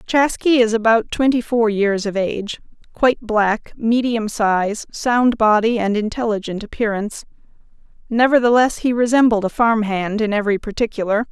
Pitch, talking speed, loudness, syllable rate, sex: 225 Hz, 140 wpm, -18 LUFS, 5.0 syllables/s, female